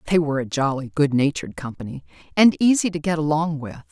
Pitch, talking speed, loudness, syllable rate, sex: 150 Hz, 185 wpm, -21 LUFS, 6.5 syllables/s, female